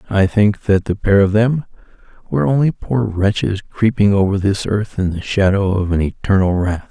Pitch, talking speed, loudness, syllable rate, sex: 100 Hz, 190 wpm, -16 LUFS, 5.0 syllables/s, male